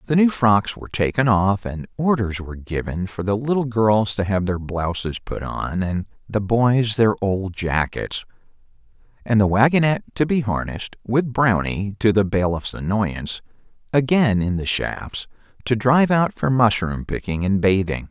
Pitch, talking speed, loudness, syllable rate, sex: 105 Hz, 165 wpm, -21 LUFS, 4.6 syllables/s, male